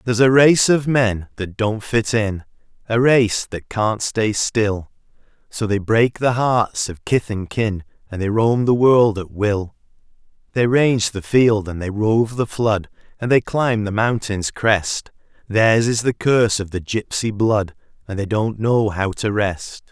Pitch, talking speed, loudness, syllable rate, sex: 110 Hz, 185 wpm, -18 LUFS, 4.0 syllables/s, male